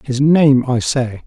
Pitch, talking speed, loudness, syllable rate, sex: 135 Hz, 190 wpm, -14 LUFS, 3.5 syllables/s, male